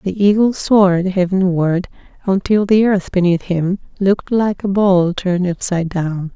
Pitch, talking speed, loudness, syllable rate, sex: 190 Hz, 150 wpm, -16 LUFS, 4.6 syllables/s, female